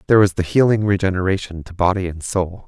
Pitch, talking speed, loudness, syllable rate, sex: 95 Hz, 200 wpm, -18 LUFS, 6.4 syllables/s, male